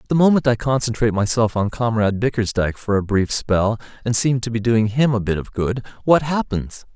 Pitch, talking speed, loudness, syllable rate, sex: 115 Hz, 205 wpm, -19 LUFS, 5.6 syllables/s, male